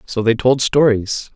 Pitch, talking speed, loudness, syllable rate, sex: 120 Hz, 175 wpm, -16 LUFS, 4.1 syllables/s, male